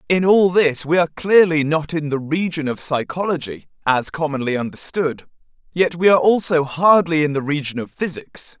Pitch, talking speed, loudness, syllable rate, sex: 160 Hz, 175 wpm, -18 LUFS, 5.2 syllables/s, male